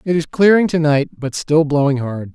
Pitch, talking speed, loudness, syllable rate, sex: 150 Hz, 230 wpm, -16 LUFS, 4.9 syllables/s, male